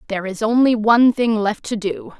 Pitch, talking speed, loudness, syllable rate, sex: 220 Hz, 220 wpm, -17 LUFS, 5.6 syllables/s, female